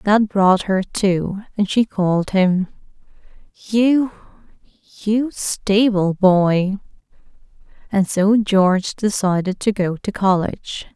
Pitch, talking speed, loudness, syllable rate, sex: 200 Hz, 100 wpm, -18 LUFS, 3.6 syllables/s, female